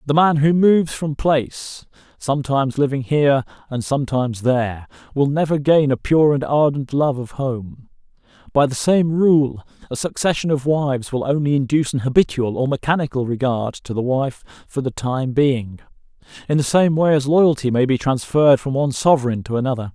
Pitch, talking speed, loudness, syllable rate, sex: 135 Hz, 175 wpm, -18 LUFS, 5.3 syllables/s, male